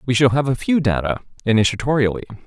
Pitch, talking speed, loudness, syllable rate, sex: 120 Hz, 170 wpm, -19 LUFS, 7.0 syllables/s, male